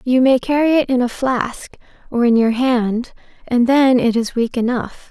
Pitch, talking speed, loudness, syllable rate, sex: 245 Hz, 200 wpm, -16 LUFS, 4.4 syllables/s, female